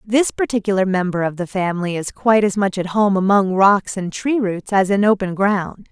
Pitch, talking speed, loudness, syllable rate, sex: 195 Hz, 215 wpm, -18 LUFS, 5.2 syllables/s, female